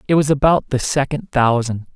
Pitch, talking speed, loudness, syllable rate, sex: 140 Hz, 185 wpm, -17 LUFS, 5.1 syllables/s, male